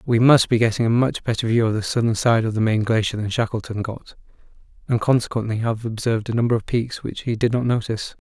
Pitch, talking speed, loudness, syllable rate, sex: 115 Hz, 230 wpm, -21 LUFS, 6.3 syllables/s, male